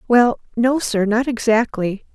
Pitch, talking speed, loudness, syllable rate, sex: 230 Hz, 140 wpm, -18 LUFS, 4.1 syllables/s, female